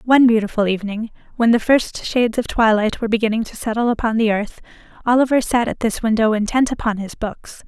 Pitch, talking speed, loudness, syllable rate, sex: 225 Hz, 195 wpm, -18 LUFS, 6.1 syllables/s, female